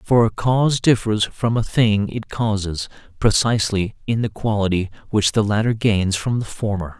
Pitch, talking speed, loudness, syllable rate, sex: 105 Hz, 170 wpm, -20 LUFS, 4.8 syllables/s, male